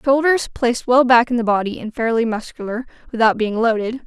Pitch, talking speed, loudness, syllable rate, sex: 235 Hz, 175 wpm, -18 LUFS, 5.7 syllables/s, female